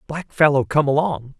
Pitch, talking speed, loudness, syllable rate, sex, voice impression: 145 Hz, 175 wpm, -18 LUFS, 5.0 syllables/s, male, very masculine, very middle-aged, thick, tensed, powerful, bright, slightly hard, clear, fluent, slightly raspy, cool, very intellectual, refreshing, sincere, calm, mature, friendly, reassuring, unique, slightly elegant, very wild, slightly sweet, lively, slightly kind, slightly intense